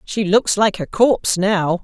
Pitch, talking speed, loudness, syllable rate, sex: 200 Hz, 195 wpm, -17 LUFS, 4.1 syllables/s, female